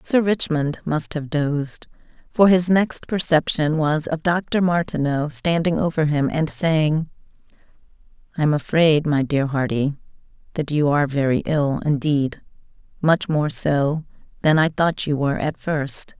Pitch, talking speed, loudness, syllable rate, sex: 155 Hz, 150 wpm, -20 LUFS, 4.2 syllables/s, female